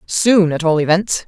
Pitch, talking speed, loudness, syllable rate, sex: 175 Hz, 190 wpm, -15 LUFS, 4.4 syllables/s, female